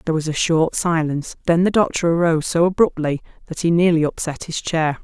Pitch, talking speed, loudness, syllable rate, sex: 165 Hz, 200 wpm, -19 LUFS, 6.0 syllables/s, female